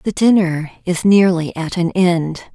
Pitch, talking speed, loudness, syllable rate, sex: 175 Hz, 165 wpm, -16 LUFS, 3.8 syllables/s, female